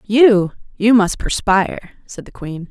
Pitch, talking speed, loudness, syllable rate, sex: 205 Hz, 155 wpm, -15 LUFS, 4.2 syllables/s, female